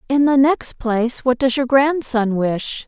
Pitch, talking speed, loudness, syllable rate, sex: 255 Hz, 190 wpm, -17 LUFS, 4.1 syllables/s, female